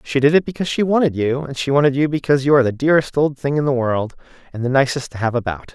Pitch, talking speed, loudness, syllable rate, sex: 140 Hz, 280 wpm, -18 LUFS, 7.2 syllables/s, male